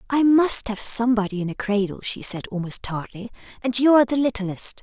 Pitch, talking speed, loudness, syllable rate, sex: 225 Hz, 200 wpm, -21 LUFS, 5.6 syllables/s, female